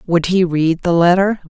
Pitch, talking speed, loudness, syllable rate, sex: 175 Hz, 200 wpm, -15 LUFS, 4.7 syllables/s, female